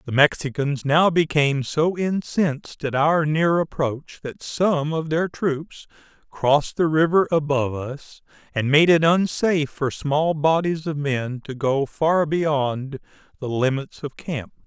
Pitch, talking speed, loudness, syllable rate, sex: 150 Hz, 150 wpm, -21 LUFS, 4.0 syllables/s, male